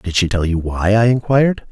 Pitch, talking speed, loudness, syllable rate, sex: 105 Hz, 245 wpm, -16 LUFS, 5.4 syllables/s, male